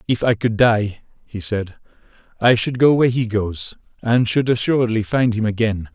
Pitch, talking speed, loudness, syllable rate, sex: 110 Hz, 180 wpm, -18 LUFS, 4.9 syllables/s, male